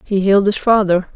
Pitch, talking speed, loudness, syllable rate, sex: 195 Hz, 210 wpm, -14 LUFS, 5.9 syllables/s, female